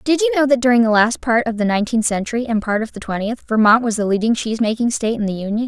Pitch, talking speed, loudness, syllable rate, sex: 230 Hz, 275 wpm, -17 LUFS, 7.0 syllables/s, female